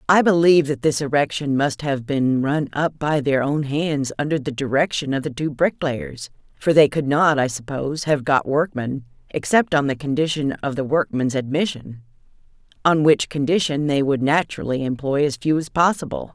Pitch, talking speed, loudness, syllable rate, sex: 145 Hz, 180 wpm, -20 LUFS, 5.0 syllables/s, female